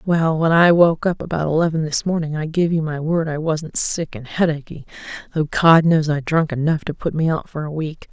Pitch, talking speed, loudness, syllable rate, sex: 160 Hz, 235 wpm, -19 LUFS, 5.2 syllables/s, female